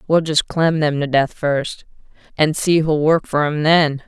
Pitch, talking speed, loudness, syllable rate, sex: 155 Hz, 205 wpm, -17 LUFS, 4.1 syllables/s, female